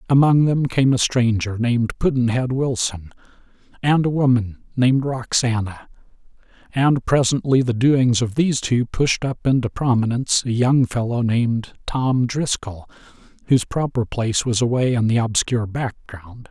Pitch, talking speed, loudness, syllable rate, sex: 125 Hz, 140 wpm, -19 LUFS, 4.7 syllables/s, male